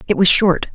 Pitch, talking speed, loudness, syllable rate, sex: 185 Hz, 240 wpm, -13 LUFS, 5.1 syllables/s, female